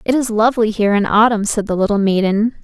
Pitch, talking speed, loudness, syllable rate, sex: 215 Hz, 225 wpm, -15 LUFS, 6.5 syllables/s, female